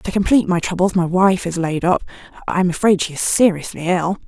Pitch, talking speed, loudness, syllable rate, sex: 180 Hz, 225 wpm, -17 LUFS, 5.9 syllables/s, female